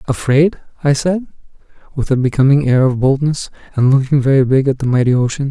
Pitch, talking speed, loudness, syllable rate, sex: 135 Hz, 185 wpm, -14 LUFS, 6.0 syllables/s, male